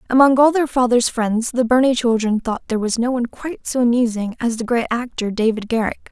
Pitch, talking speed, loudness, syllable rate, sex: 240 Hz, 215 wpm, -18 LUFS, 5.9 syllables/s, female